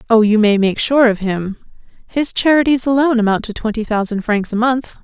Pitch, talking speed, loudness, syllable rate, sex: 230 Hz, 200 wpm, -15 LUFS, 5.4 syllables/s, female